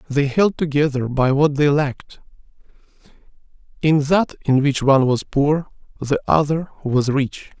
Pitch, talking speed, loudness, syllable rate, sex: 145 Hz, 140 wpm, -18 LUFS, 4.6 syllables/s, male